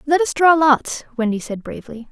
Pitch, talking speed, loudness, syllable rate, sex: 270 Hz, 200 wpm, -17 LUFS, 5.4 syllables/s, female